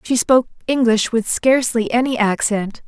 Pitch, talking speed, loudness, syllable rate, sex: 235 Hz, 145 wpm, -17 LUFS, 5.1 syllables/s, female